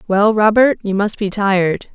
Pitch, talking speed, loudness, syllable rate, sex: 205 Hz, 185 wpm, -15 LUFS, 4.6 syllables/s, female